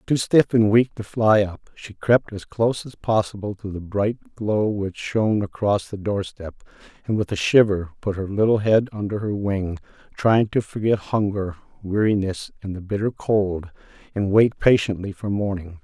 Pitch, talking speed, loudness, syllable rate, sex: 105 Hz, 180 wpm, -22 LUFS, 4.6 syllables/s, male